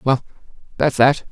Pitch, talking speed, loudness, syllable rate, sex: 135 Hz, 135 wpm, -18 LUFS, 4.1 syllables/s, male